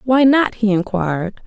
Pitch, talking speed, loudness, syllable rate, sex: 215 Hz, 165 wpm, -16 LUFS, 4.4 syllables/s, female